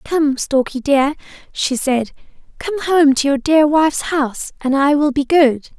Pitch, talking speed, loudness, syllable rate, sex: 285 Hz, 175 wpm, -16 LUFS, 4.2 syllables/s, female